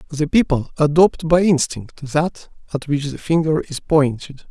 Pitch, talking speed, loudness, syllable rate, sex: 150 Hz, 160 wpm, -18 LUFS, 4.3 syllables/s, male